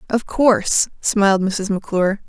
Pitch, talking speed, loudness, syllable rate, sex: 205 Hz, 130 wpm, -18 LUFS, 5.2 syllables/s, female